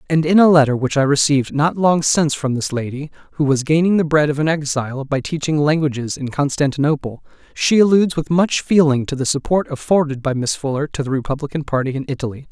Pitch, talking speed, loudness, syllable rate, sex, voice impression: 145 Hz, 210 wpm, -17 LUFS, 6.1 syllables/s, male, masculine, adult-like, slightly fluent, refreshing, sincere, slightly lively